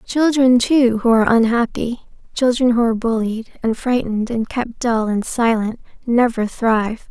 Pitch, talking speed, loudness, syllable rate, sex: 235 Hz, 150 wpm, -17 LUFS, 4.7 syllables/s, female